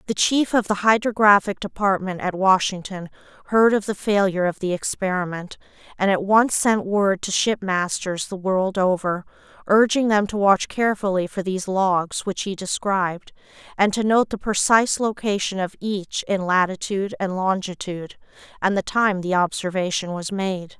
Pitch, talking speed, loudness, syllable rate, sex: 195 Hz, 160 wpm, -21 LUFS, 4.9 syllables/s, female